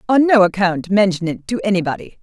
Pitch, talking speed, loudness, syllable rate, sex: 195 Hz, 190 wpm, -16 LUFS, 5.8 syllables/s, female